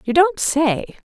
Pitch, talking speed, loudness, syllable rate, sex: 290 Hz, 165 wpm, -18 LUFS, 3.3 syllables/s, female